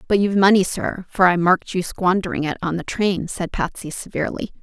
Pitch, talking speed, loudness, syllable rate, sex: 180 Hz, 210 wpm, -20 LUFS, 5.8 syllables/s, female